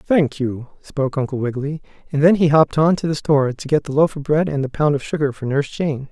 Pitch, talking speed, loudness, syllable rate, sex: 145 Hz, 265 wpm, -19 LUFS, 6.3 syllables/s, male